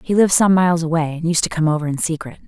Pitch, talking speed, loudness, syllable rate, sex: 165 Hz, 290 wpm, -17 LUFS, 7.3 syllables/s, female